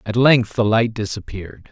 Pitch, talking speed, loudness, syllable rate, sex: 110 Hz, 175 wpm, -18 LUFS, 5.0 syllables/s, male